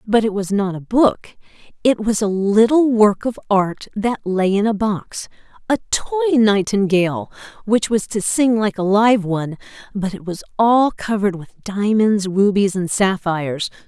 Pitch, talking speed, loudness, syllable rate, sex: 205 Hz, 170 wpm, -18 LUFS, 4.4 syllables/s, female